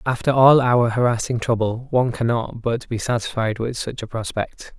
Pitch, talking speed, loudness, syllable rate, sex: 120 Hz, 175 wpm, -20 LUFS, 5.0 syllables/s, male